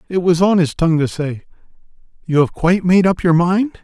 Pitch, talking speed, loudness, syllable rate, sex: 175 Hz, 220 wpm, -15 LUFS, 5.8 syllables/s, male